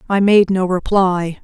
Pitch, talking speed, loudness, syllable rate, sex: 190 Hz, 170 wpm, -15 LUFS, 4.1 syllables/s, female